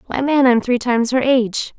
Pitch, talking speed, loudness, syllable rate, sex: 245 Hz, 235 wpm, -16 LUFS, 5.6 syllables/s, female